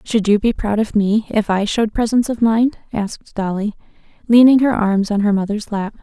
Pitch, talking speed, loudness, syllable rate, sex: 215 Hz, 210 wpm, -17 LUFS, 5.4 syllables/s, female